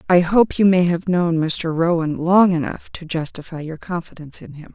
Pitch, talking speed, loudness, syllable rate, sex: 170 Hz, 200 wpm, -19 LUFS, 5.0 syllables/s, female